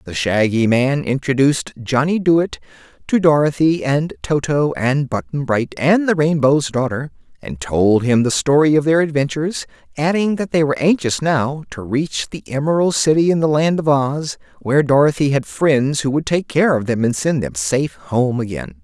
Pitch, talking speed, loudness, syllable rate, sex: 140 Hz, 180 wpm, -17 LUFS, 4.8 syllables/s, male